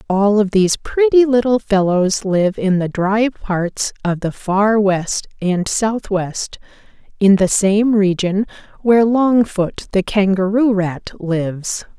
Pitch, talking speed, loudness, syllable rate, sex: 205 Hz, 135 wpm, -16 LUFS, 3.7 syllables/s, female